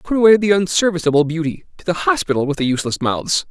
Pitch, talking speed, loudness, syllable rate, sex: 170 Hz, 205 wpm, -17 LUFS, 6.7 syllables/s, male